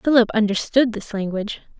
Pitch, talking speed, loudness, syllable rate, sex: 220 Hz, 135 wpm, -20 LUFS, 5.7 syllables/s, female